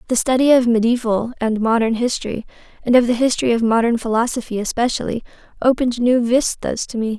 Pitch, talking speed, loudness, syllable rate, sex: 235 Hz, 165 wpm, -18 LUFS, 6.1 syllables/s, female